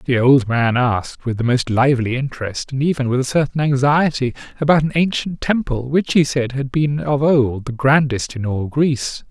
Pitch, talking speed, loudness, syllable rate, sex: 135 Hz, 200 wpm, -18 LUFS, 5.0 syllables/s, male